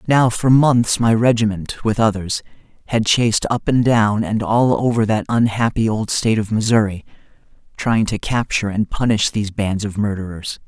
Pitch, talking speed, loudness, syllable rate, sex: 110 Hz, 170 wpm, -17 LUFS, 5.0 syllables/s, male